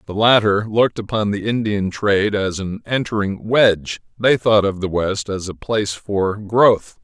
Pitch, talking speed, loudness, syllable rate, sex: 105 Hz, 180 wpm, -18 LUFS, 4.5 syllables/s, male